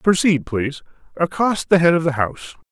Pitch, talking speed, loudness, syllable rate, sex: 160 Hz, 155 wpm, -19 LUFS, 5.3 syllables/s, male